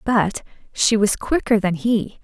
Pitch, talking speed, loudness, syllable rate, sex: 215 Hz, 160 wpm, -19 LUFS, 3.8 syllables/s, female